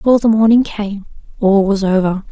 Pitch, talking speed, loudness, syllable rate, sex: 205 Hz, 180 wpm, -14 LUFS, 5.8 syllables/s, female